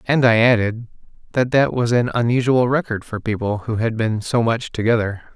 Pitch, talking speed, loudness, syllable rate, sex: 115 Hz, 190 wpm, -19 LUFS, 5.2 syllables/s, male